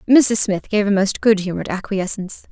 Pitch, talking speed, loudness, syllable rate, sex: 205 Hz, 190 wpm, -18 LUFS, 5.7 syllables/s, female